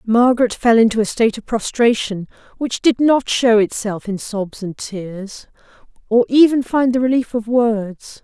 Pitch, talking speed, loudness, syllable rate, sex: 225 Hz, 165 wpm, -17 LUFS, 4.5 syllables/s, female